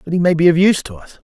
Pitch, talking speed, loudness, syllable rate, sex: 170 Hz, 365 wpm, -14 LUFS, 8.0 syllables/s, male